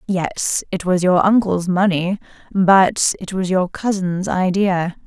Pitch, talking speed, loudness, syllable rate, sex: 185 Hz, 140 wpm, -17 LUFS, 3.7 syllables/s, female